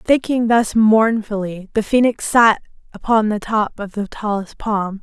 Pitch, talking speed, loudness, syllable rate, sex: 215 Hz, 155 wpm, -17 LUFS, 4.1 syllables/s, female